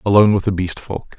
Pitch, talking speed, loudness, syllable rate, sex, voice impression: 95 Hz, 255 wpm, -17 LUFS, 6.4 syllables/s, male, masculine, adult-like, slightly thick, cool, slightly intellectual, slightly refreshing